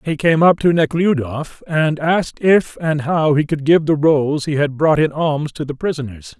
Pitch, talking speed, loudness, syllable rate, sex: 150 Hz, 215 wpm, -16 LUFS, 4.5 syllables/s, male